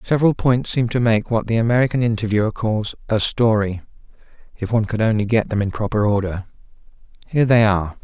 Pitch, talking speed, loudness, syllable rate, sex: 110 Hz, 180 wpm, -19 LUFS, 6.4 syllables/s, male